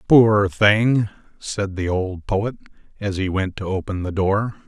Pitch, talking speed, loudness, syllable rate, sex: 100 Hz, 165 wpm, -20 LUFS, 3.8 syllables/s, male